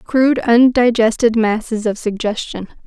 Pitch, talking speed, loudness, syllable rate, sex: 230 Hz, 105 wpm, -15 LUFS, 4.7 syllables/s, female